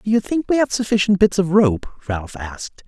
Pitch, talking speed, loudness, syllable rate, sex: 180 Hz, 230 wpm, -19 LUFS, 5.2 syllables/s, male